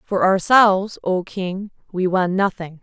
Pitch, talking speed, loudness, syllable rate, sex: 190 Hz, 150 wpm, -18 LUFS, 4.0 syllables/s, female